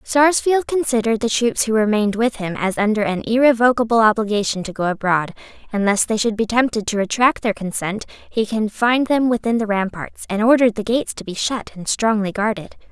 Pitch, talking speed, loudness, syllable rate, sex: 220 Hz, 195 wpm, -18 LUFS, 5.8 syllables/s, female